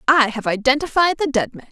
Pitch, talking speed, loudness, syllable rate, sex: 270 Hz, 210 wpm, -18 LUFS, 6.0 syllables/s, female